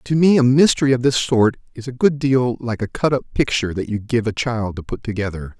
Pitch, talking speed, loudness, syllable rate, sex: 120 Hz, 255 wpm, -18 LUFS, 5.8 syllables/s, male